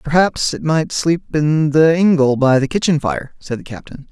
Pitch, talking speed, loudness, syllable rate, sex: 150 Hz, 205 wpm, -16 LUFS, 4.7 syllables/s, male